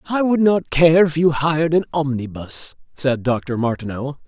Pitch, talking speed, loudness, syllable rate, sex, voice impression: 150 Hz, 170 wpm, -18 LUFS, 4.5 syllables/s, male, very masculine, very adult-like, very middle-aged, very thick, tensed, powerful, very bright, soft, very clear, fluent, slightly raspy, cool, very intellectual, slightly refreshing, sincere, very calm, mature, very friendly, very reassuring, unique, elegant, wild, sweet, lively, kind